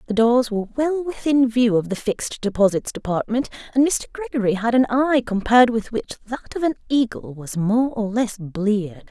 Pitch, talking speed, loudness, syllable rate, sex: 230 Hz, 190 wpm, -21 LUFS, 5.3 syllables/s, female